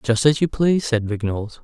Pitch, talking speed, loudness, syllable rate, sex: 125 Hz, 220 wpm, -20 LUFS, 5.9 syllables/s, male